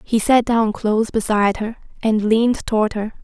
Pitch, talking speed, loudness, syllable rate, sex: 220 Hz, 185 wpm, -18 LUFS, 5.3 syllables/s, female